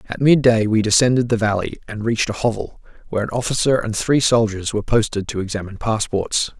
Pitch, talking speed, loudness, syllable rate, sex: 110 Hz, 190 wpm, -19 LUFS, 6.2 syllables/s, male